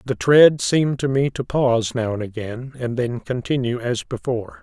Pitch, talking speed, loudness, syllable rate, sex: 125 Hz, 195 wpm, -20 LUFS, 5.0 syllables/s, male